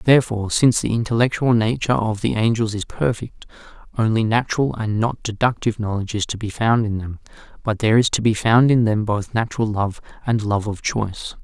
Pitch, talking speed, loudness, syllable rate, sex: 110 Hz, 195 wpm, -20 LUFS, 5.9 syllables/s, male